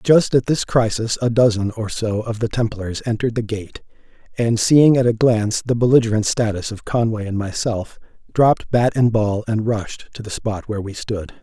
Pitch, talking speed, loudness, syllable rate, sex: 110 Hz, 200 wpm, -19 LUFS, 5.0 syllables/s, male